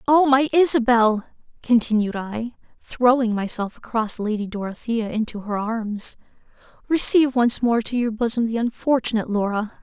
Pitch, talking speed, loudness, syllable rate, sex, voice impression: 230 Hz, 135 wpm, -21 LUFS, 3.3 syllables/s, female, very feminine, young, very thin, tensed, slightly weak, bright, soft, very clear, fluent, very cute, intellectual, very refreshing, sincere, slightly calm, very friendly, very reassuring, unique, elegant, slightly sweet, lively, slightly strict, slightly intense, slightly sharp